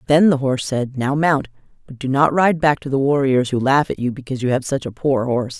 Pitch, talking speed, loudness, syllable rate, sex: 135 Hz, 270 wpm, -18 LUFS, 5.9 syllables/s, female